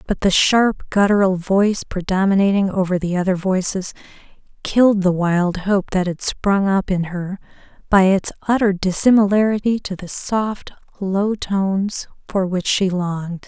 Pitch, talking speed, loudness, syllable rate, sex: 195 Hz, 145 wpm, -18 LUFS, 4.5 syllables/s, female